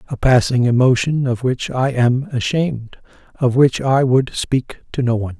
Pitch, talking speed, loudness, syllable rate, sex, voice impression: 130 Hz, 180 wpm, -17 LUFS, 4.7 syllables/s, male, very masculine, slightly old, thick, sincere, calm, slightly elegant, slightly kind